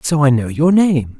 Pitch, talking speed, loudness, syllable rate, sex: 145 Hz, 250 wpm, -14 LUFS, 4.6 syllables/s, male